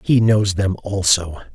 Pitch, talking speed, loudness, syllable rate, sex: 100 Hz, 155 wpm, -17 LUFS, 3.7 syllables/s, male